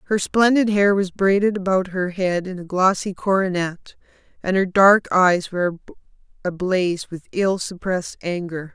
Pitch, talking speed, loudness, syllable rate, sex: 185 Hz, 150 wpm, -20 LUFS, 4.7 syllables/s, female